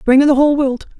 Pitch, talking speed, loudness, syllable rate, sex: 275 Hz, 300 wpm, -13 LUFS, 7.5 syllables/s, female